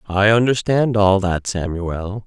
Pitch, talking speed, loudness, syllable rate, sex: 100 Hz, 135 wpm, -18 LUFS, 3.8 syllables/s, male